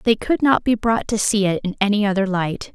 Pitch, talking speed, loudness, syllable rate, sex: 205 Hz, 260 wpm, -19 LUFS, 5.5 syllables/s, female